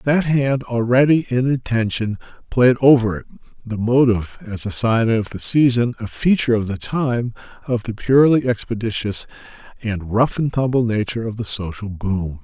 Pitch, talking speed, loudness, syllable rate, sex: 115 Hz, 165 wpm, -19 LUFS, 5.0 syllables/s, male